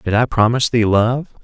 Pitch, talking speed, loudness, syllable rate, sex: 115 Hz, 210 wpm, -16 LUFS, 5.5 syllables/s, male